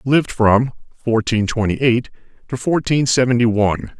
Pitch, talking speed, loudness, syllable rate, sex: 120 Hz, 135 wpm, -17 LUFS, 5.0 syllables/s, male